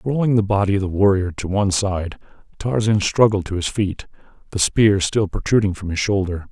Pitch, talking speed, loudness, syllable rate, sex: 100 Hz, 195 wpm, -19 LUFS, 5.5 syllables/s, male